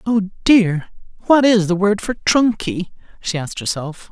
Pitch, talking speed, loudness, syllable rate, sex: 200 Hz, 175 wpm, -17 LUFS, 4.3 syllables/s, male